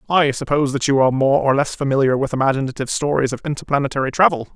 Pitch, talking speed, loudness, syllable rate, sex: 135 Hz, 200 wpm, -18 LUFS, 7.5 syllables/s, male